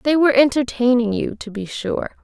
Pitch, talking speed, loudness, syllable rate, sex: 250 Hz, 190 wpm, -18 LUFS, 5.3 syllables/s, female